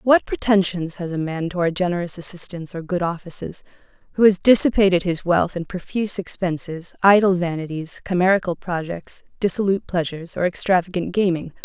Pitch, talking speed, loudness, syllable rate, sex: 180 Hz, 150 wpm, -21 LUFS, 5.7 syllables/s, female